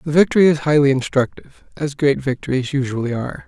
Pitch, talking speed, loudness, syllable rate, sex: 140 Hz, 175 wpm, -18 LUFS, 6.5 syllables/s, male